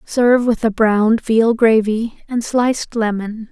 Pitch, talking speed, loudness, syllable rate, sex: 225 Hz, 155 wpm, -16 LUFS, 4.2 syllables/s, female